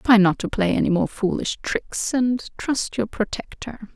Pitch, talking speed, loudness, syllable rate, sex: 220 Hz, 180 wpm, -22 LUFS, 4.6 syllables/s, female